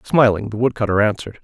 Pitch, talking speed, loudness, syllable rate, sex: 110 Hz, 170 wpm, -18 LUFS, 6.8 syllables/s, male